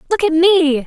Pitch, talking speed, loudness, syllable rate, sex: 335 Hz, 210 wpm, -13 LUFS, 4.6 syllables/s, female